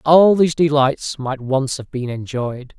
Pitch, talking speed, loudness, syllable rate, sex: 140 Hz, 175 wpm, -18 LUFS, 4.1 syllables/s, male